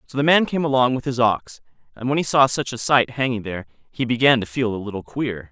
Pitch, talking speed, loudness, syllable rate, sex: 120 Hz, 260 wpm, -20 LUFS, 6.0 syllables/s, male